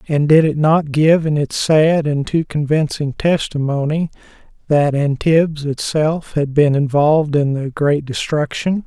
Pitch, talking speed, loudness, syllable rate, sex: 150 Hz, 150 wpm, -16 LUFS, 4.2 syllables/s, male